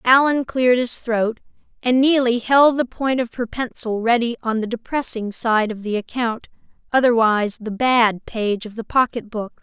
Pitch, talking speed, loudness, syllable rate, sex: 235 Hz, 170 wpm, -19 LUFS, 4.7 syllables/s, female